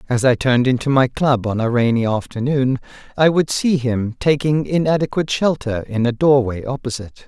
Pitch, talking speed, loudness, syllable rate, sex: 130 Hz, 175 wpm, -18 LUFS, 5.4 syllables/s, male